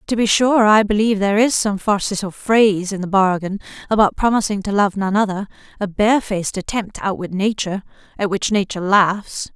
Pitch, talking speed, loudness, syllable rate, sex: 200 Hz, 175 wpm, -18 LUFS, 5.7 syllables/s, female